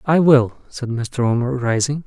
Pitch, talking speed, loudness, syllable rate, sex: 130 Hz, 175 wpm, -18 LUFS, 4.3 syllables/s, male